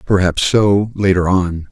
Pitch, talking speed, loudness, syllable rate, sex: 95 Hz, 140 wpm, -15 LUFS, 3.9 syllables/s, male